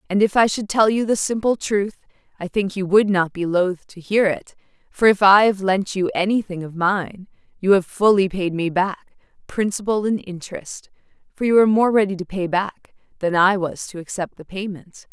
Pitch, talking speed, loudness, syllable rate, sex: 195 Hz, 205 wpm, -19 LUFS, 5.0 syllables/s, female